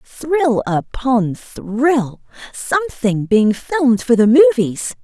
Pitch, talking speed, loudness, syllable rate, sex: 250 Hz, 105 wpm, -16 LUFS, 3.1 syllables/s, female